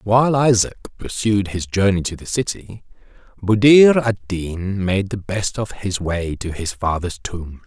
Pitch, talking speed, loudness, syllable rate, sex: 100 Hz, 165 wpm, -19 LUFS, 4.2 syllables/s, male